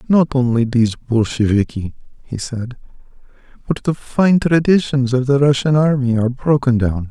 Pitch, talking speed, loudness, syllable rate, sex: 130 Hz, 145 wpm, -16 LUFS, 4.9 syllables/s, male